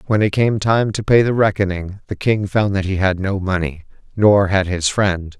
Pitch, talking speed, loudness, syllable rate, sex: 100 Hz, 225 wpm, -17 LUFS, 4.7 syllables/s, male